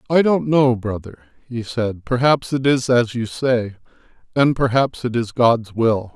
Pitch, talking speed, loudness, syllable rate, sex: 120 Hz, 175 wpm, -19 LUFS, 4.2 syllables/s, male